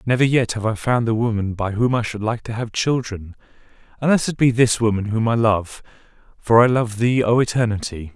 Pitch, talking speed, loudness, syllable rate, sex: 115 Hz, 215 wpm, -19 LUFS, 5.4 syllables/s, male